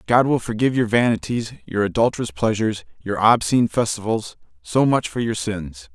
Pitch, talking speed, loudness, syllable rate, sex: 110 Hz, 160 wpm, -20 LUFS, 5.6 syllables/s, male